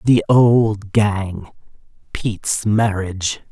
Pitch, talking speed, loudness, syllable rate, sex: 105 Hz, 85 wpm, -17 LUFS, 3.0 syllables/s, male